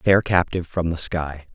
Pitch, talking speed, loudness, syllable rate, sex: 85 Hz, 235 wpm, -22 LUFS, 5.5 syllables/s, male